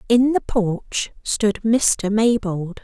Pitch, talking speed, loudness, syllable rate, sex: 215 Hz, 125 wpm, -20 LUFS, 2.8 syllables/s, female